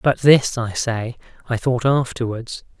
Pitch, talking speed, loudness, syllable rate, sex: 120 Hz, 150 wpm, -19 LUFS, 3.9 syllables/s, male